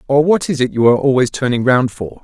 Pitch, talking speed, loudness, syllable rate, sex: 135 Hz, 270 wpm, -14 LUFS, 6.3 syllables/s, male